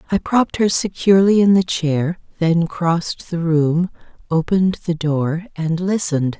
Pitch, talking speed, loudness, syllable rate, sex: 170 Hz, 150 wpm, -18 LUFS, 4.7 syllables/s, female